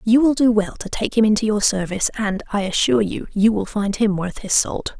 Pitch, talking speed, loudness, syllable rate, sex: 210 Hz, 250 wpm, -19 LUFS, 5.6 syllables/s, female